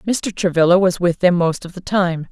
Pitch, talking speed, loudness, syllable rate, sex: 180 Hz, 235 wpm, -17 LUFS, 4.9 syllables/s, female